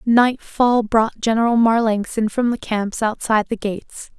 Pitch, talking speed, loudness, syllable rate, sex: 225 Hz, 160 wpm, -18 LUFS, 4.5 syllables/s, female